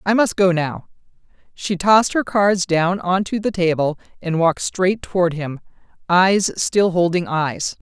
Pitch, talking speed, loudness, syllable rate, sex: 180 Hz, 160 wpm, -18 LUFS, 4.3 syllables/s, female